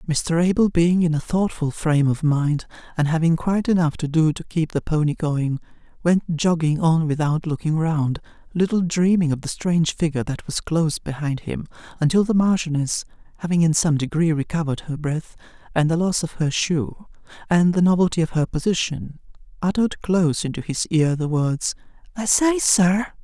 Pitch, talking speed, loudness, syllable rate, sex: 165 Hz, 175 wpm, -21 LUFS, 5.2 syllables/s, male